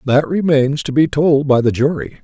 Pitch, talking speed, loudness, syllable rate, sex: 140 Hz, 215 wpm, -15 LUFS, 5.0 syllables/s, male